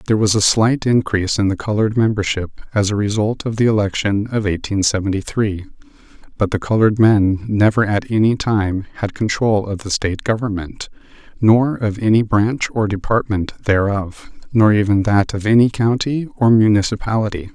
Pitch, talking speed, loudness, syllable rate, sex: 105 Hz, 165 wpm, -17 LUFS, 5.3 syllables/s, male